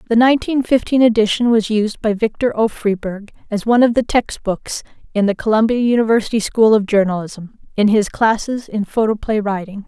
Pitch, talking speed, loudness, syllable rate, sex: 220 Hz, 175 wpm, -16 LUFS, 5.5 syllables/s, female